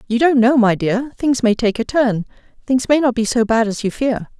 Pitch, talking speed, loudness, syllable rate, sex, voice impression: 240 Hz, 230 wpm, -17 LUFS, 5.2 syllables/s, female, feminine, slightly gender-neutral, very adult-like, very middle-aged, slightly thin, slightly tensed, slightly weak, slightly dark, soft, slightly clear, very fluent, slightly cool, intellectual, refreshing, sincere, slightly calm, slightly friendly, slightly reassuring, unique, elegant, slightly wild, slightly lively, strict, sharp